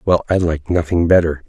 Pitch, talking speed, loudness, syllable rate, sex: 85 Hz, 205 wpm, -16 LUFS, 5.4 syllables/s, male